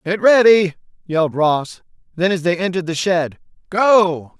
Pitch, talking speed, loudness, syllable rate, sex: 180 Hz, 150 wpm, -16 LUFS, 4.5 syllables/s, male